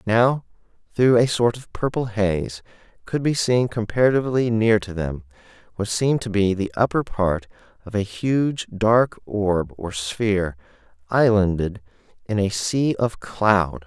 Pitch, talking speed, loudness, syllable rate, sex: 105 Hz, 145 wpm, -21 LUFS, 4.2 syllables/s, male